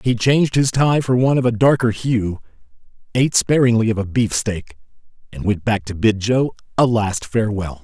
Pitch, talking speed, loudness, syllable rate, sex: 115 Hz, 185 wpm, -18 LUFS, 5.3 syllables/s, male